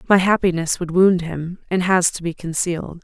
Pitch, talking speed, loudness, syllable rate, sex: 175 Hz, 200 wpm, -19 LUFS, 5.1 syllables/s, female